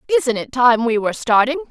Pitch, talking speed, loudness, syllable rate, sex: 255 Hz, 210 wpm, -17 LUFS, 5.7 syllables/s, female